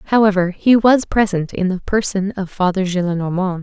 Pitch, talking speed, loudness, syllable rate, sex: 195 Hz, 165 wpm, -17 LUFS, 5.0 syllables/s, female